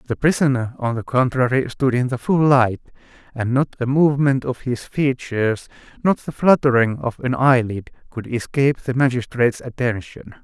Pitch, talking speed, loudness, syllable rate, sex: 125 Hz, 160 wpm, -19 LUFS, 5.1 syllables/s, male